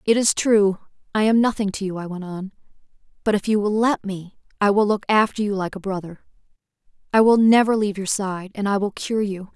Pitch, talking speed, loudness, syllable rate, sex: 205 Hz, 225 wpm, -21 LUFS, 5.7 syllables/s, female